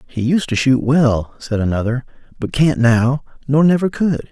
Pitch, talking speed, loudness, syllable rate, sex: 130 Hz, 180 wpm, -16 LUFS, 4.5 syllables/s, male